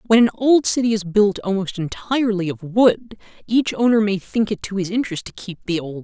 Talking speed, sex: 230 wpm, male